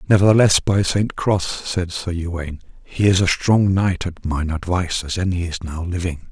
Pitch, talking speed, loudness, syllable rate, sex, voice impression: 90 Hz, 190 wpm, -19 LUFS, 4.9 syllables/s, male, masculine, middle-aged, slightly relaxed, weak, slightly dark, soft, slightly halting, raspy, cool, intellectual, calm, slightly mature, reassuring, wild, modest